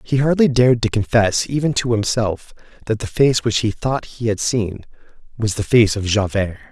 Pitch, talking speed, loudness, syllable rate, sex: 115 Hz, 195 wpm, -18 LUFS, 5.0 syllables/s, male